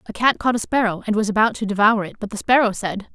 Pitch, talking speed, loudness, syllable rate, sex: 215 Hz, 285 wpm, -19 LUFS, 6.6 syllables/s, female